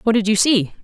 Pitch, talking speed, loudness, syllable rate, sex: 215 Hz, 290 wpm, -16 LUFS, 5.8 syllables/s, female